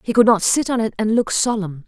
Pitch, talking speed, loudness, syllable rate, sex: 215 Hz, 290 wpm, -18 LUFS, 5.8 syllables/s, female